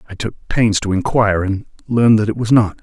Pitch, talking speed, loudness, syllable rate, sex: 105 Hz, 235 wpm, -16 LUFS, 5.8 syllables/s, male